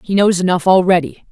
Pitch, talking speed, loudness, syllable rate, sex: 180 Hz, 185 wpm, -14 LUFS, 5.9 syllables/s, female